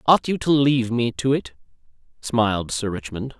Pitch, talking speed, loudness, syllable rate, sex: 120 Hz, 175 wpm, -21 LUFS, 5.0 syllables/s, male